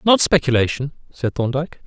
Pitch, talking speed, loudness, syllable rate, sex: 145 Hz, 130 wpm, -19 LUFS, 5.8 syllables/s, male